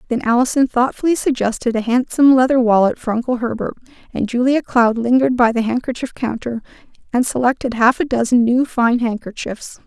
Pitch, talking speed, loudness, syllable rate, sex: 240 Hz, 165 wpm, -17 LUFS, 5.7 syllables/s, female